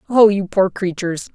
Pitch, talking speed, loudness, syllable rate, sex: 190 Hz, 180 wpm, -17 LUFS, 5.7 syllables/s, female